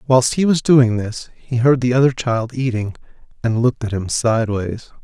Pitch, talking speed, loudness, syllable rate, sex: 120 Hz, 190 wpm, -18 LUFS, 4.9 syllables/s, male